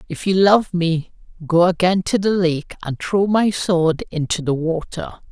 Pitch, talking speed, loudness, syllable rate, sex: 175 Hz, 180 wpm, -18 LUFS, 4.1 syllables/s, female